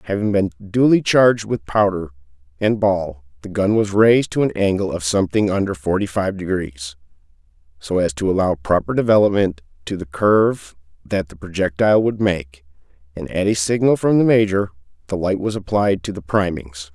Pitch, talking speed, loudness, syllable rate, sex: 95 Hz, 175 wpm, -18 LUFS, 5.4 syllables/s, male